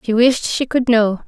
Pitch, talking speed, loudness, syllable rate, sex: 235 Hz, 235 wpm, -16 LUFS, 4.3 syllables/s, female